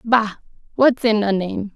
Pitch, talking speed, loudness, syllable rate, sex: 215 Hz, 170 wpm, -19 LUFS, 4.2 syllables/s, female